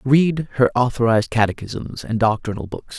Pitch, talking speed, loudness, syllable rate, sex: 120 Hz, 140 wpm, -20 LUFS, 5.1 syllables/s, male